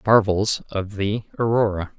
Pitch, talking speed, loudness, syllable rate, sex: 105 Hz, 120 wpm, -22 LUFS, 4.3 syllables/s, male